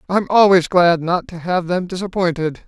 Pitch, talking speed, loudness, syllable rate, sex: 180 Hz, 180 wpm, -17 LUFS, 5.0 syllables/s, male